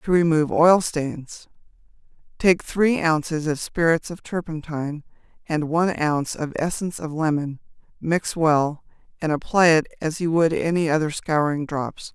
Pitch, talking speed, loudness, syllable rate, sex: 160 Hz, 145 wpm, -22 LUFS, 4.7 syllables/s, female